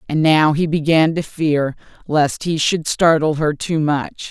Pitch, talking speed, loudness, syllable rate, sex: 155 Hz, 180 wpm, -17 LUFS, 3.9 syllables/s, female